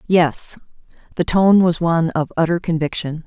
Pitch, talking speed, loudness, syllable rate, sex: 165 Hz, 145 wpm, -18 LUFS, 4.9 syllables/s, female